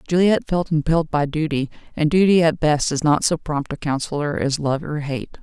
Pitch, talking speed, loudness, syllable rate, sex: 155 Hz, 210 wpm, -20 LUFS, 5.4 syllables/s, female